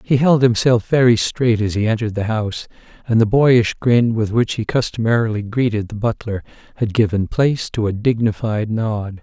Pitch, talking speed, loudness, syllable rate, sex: 115 Hz, 180 wpm, -17 LUFS, 5.1 syllables/s, male